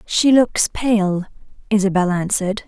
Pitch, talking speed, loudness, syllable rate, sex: 200 Hz, 110 wpm, -17 LUFS, 4.3 syllables/s, female